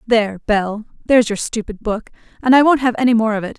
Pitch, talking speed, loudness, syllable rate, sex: 225 Hz, 235 wpm, -17 LUFS, 6.2 syllables/s, female